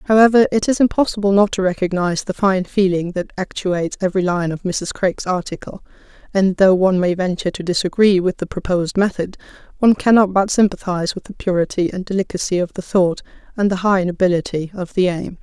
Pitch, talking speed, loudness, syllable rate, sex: 190 Hz, 185 wpm, -18 LUFS, 6.0 syllables/s, female